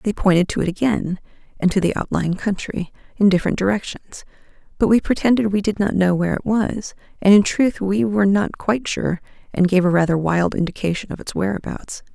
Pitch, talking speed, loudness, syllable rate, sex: 195 Hz, 195 wpm, -19 LUFS, 5.7 syllables/s, female